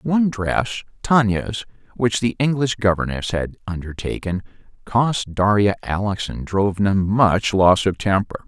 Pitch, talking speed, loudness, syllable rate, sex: 105 Hz, 115 wpm, -20 LUFS, 4.2 syllables/s, male